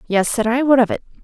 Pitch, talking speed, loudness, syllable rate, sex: 240 Hz, 290 wpm, -17 LUFS, 6.5 syllables/s, female